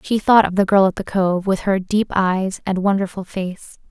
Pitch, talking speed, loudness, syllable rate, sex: 195 Hz, 230 wpm, -18 LUFS, 4.7 syllables/s, female